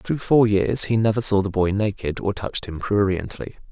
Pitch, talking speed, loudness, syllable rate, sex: 100 Hz, 210 wpm, -21 LUFS, 5.1 syllables/s, male